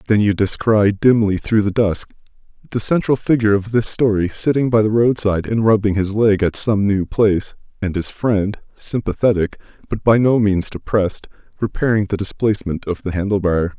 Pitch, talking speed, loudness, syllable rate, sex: 105 Hz, 180 wpm, -17 LUFS, 4.9 syllables/s, male